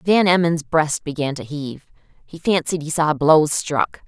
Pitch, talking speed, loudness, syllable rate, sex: 155 Hz, 175 wpm, -19 LUFS, 4.5 syllables/s, female